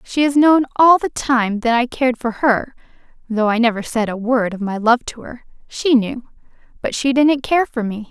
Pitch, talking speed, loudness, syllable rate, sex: 245 Hz, 205 wpm, -17 LUFS, 4.8 syllables/s, female